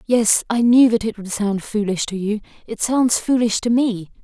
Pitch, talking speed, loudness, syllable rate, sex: 220 Hz, 210 wpm, -18 LUFS, 4.6 syllables/s, female